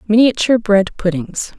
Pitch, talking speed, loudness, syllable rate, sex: 210 Hz, 115 wpm, -15 LUFS, 5.0 syllables/s, female